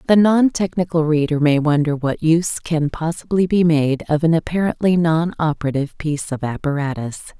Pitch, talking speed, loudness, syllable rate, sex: 160 Hz, 160 wpm, -18 LUFS, 5.4 syllables/s, female